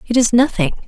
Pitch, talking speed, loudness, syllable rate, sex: 230 Hz, 205 wpm, -15 LUFS, 6.4 syllables/s, female